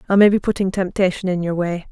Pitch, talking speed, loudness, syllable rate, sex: 185 Hz, 250 wpm, -19 LUFS, 6.4 syllables/s, female